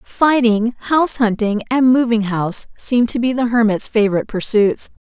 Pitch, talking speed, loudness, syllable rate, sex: 230 Hz, 155 wpm, -16 LUFS, 5.1 syllables/s, female